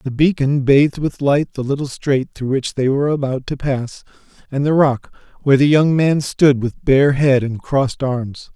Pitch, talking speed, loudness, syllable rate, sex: 135 Hz, 205 wpm, -17 LUFS, 4.7 syllables/s, male